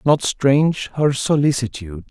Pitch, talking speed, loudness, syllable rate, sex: 135 Hz, 115 wpm, -18 LUFS, 4.8 syllables/s, male